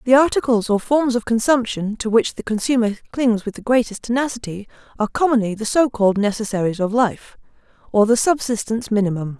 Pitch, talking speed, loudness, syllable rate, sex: 225 Hz, 165 wpm, -19 LUFS, 6.0 syllables/s, female